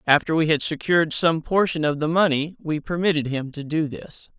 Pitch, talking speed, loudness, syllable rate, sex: 155 Hz, 205 wpm, -22 LUFS, 5.3 syllables/s, male